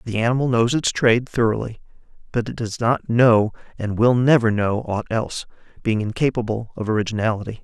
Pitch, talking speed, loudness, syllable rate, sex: 115 Hz, 165 wpm, -20 LUFS, 5.7 syllables/s, male